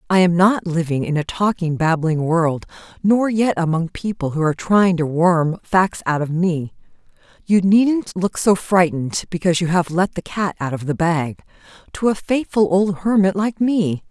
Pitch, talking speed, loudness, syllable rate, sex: 180 Hz, 185 wpm, -18 LUFS, 4.6 syllables/s, female